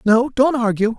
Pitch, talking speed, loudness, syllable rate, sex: 235 Hz, 185 wpm, -17 LUFS, 4.6 syllables/s, male